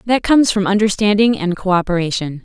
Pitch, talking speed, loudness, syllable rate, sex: 200 Hz, 150 wpm, -15 LUFS, 5.6 syllables/s, female